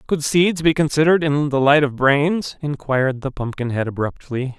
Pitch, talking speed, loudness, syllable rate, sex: 145 Hz, 170 wpm, -19 LUFS, 5.0 syllables/s, male